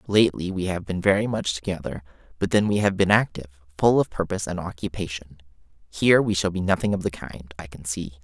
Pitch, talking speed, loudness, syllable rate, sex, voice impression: 90 Hz, 210 wpm, -23 LUFS, 6.2 syllables/s, male, masculine, adult-like, slightly middle-aged, slightly thick, slightly relaxed, slightly weak, slightly dark, slightly hard, slightly muffled, fluent, slightly raspy, intellectual, slightly refreshing, sincere, very calm, mature, slightly friendly, slightly reassuring, very unique, slightly elegant, slightly wild, slightly lively, modest